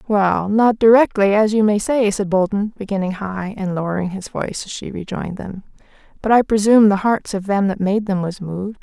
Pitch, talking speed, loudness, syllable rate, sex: 200 Hz, 210 wpm, -18 LUFS, 5.5 syllables/s, female